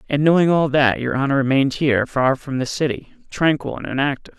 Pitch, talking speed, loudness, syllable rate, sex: 140 Hz, 205 wpm, -19 LUFS, 6.2 syllables/s, male